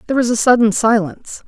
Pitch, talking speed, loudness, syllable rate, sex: 225 Hz, 205 wpm, -14 LUFS, 7.1 syllables/s, female